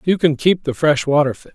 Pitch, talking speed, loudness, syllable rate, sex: 150 Hz, 230 wpm, -17 LUFS, 5.5 syllables/s, male